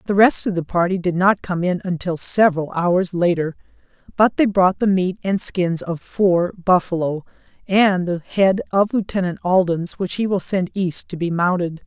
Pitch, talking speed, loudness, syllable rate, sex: 180 Hz, 185 wpm, -19 LUFS, 4.6 syllables/s, female